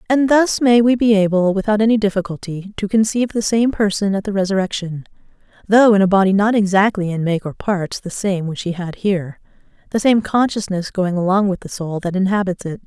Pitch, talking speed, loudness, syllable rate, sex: 200 Hz, 200 wpm, -17 LUFS, 5.7 syllables/s, female